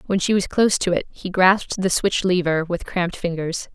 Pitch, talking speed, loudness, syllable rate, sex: 180 Hz, 225 wpm, -20 LUFS, 5.4 syllables/s, female